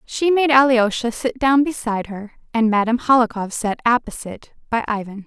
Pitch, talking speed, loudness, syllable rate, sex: 235 Hz, 160 wpm, -18 LUFS, 5.5 syllables/s, female